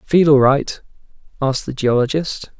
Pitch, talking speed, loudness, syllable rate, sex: 140 Hz, 140 wpm, -17 LUFS, 4.8 syllables/s, male